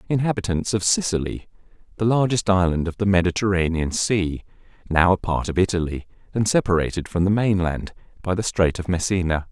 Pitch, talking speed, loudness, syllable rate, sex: 95 Hz, 160 wpm, -21 LUFS, 5.6 syllables/s, male